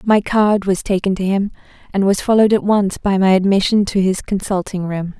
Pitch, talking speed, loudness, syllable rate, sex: 195 Hz, 210 wpm, -16 LUFS, 5.4 syllables/s, female